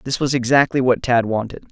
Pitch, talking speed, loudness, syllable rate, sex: 125 Hz, 210 wpm, -18 LUFS, 5.8 syllables/s, male